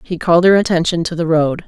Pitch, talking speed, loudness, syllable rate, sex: 170 Hz, 250 wpm, -14 LUFS, 6.4 syllables/s, female